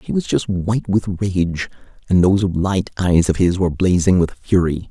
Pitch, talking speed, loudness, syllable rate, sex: 90 Hz, 195 wpm, -18 LUFS, 4.8 syllables/s, male